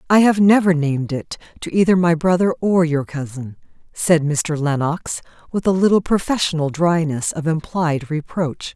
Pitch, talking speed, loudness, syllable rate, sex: 165 Hz, 160 wpm, -18 LUFS, 4.7 syllables/s, female